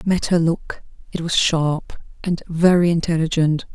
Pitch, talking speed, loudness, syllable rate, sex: 165 Hz, 160 wpm, -19 LUFS, 4.7 syllables/s, female